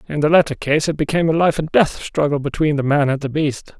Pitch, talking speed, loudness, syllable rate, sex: 150 Hz, 270 wpm, -18 LUFS, 6.2 syllables/s, male